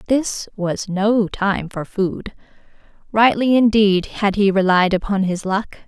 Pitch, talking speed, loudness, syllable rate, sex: 200 Hz, 145 wpm, -18 LUFS, 3.9 syllables/s, female